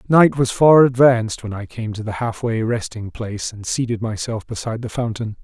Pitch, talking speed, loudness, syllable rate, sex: 115 Hz, 200 wpm, -19 LUFS, 5.4 syllables/s, male